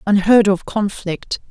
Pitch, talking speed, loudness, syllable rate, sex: 200 Hz, 120 wpm, -17 LUFS, 3.8 syllables/s, female